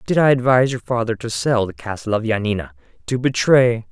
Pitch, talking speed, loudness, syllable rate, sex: 120 Hz, 185 wpm, -18 LUFS, 5.8 syllables/s, male